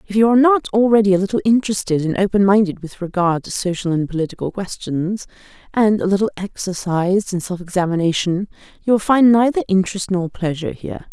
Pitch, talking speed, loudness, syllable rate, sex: 195 Hz, 180 wpm, -18 LUFS, 6.3 syllables/s, female